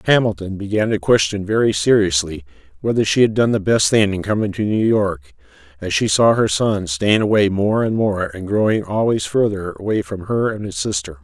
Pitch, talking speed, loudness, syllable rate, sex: 105 Hz, 210 wpm, -18 LUFS, 5.3 syllables/s, male